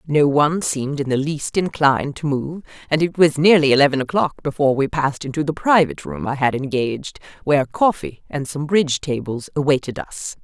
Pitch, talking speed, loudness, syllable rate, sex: 145 Hz, 190 wpm, -19 LUFS, 5.7 syllables/s, female